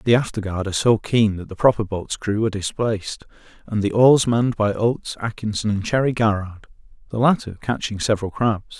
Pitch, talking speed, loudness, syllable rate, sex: 110 Hz, 190 wpm, -21 LUFS, 5.5 syllables/s, male